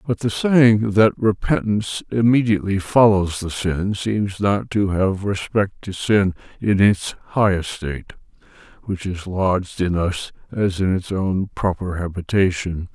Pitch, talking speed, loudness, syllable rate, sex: 100 Hz, 145 wpm, -20 LUFS, 4.1 syllables/s, male